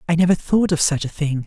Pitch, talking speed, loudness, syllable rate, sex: 165 Hz, 285 wpm, -19 LUFS, 6.1 syllables/s, male